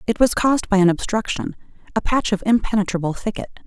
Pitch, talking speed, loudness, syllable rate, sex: 210 Hz, 165 wpm, -20 LUFS, 6.3 syllables/s, female